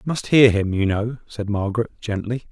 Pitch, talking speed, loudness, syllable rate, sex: 110 Hz, 215 wpm, -20 LUFS, 5.5 syllables/s, male